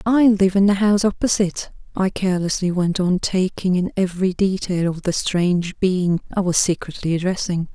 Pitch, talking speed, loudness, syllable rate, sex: 185 Hz, 170 wpm, -19 LUFS, 5.3 syllables/s, female